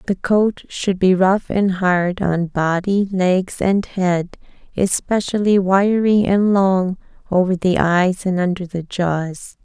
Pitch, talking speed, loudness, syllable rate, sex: 185 Hz, 145 wpm, -18 LUFS, 3.5 syllables/s, female